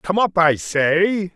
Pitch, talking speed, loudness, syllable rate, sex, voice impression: 175 Hz, 180 wpm, -18 LUFS, 3.1 syllables/s, male, very masculine, very middle-aged, very thick, very tensed, very powerful, very bright, soft, muffled, fluent, slightly raspy, very cool, intellectual, slightly refreshing, sincere, calm, very mature, very friendly, reassuring, very unique, slightly elegant, very wild, sweet, very lively, kind, intense